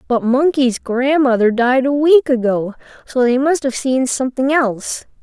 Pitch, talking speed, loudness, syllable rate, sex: 260 Hz, 160 wpm, -15 LUFS, 4.5 syllables/s, female